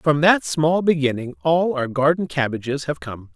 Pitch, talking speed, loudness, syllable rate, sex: 145 Hz, 180 wpm, -20 LUFS, 4.7 syllables/s, male